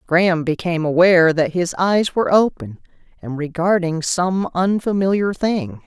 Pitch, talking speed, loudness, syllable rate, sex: 175 Hz, 135 wpm, -18 LUFS, 4.7 syllables/s, female